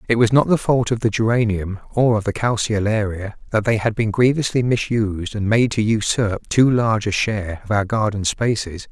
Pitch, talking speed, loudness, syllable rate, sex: 110 Hz, 200 wpm, -19 LUFS, 5.2 syllables/s, male